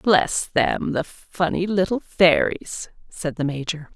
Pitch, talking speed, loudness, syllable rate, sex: 170 Hz, 135 wpm, -22 LUFS, 3.5 syllables/s, female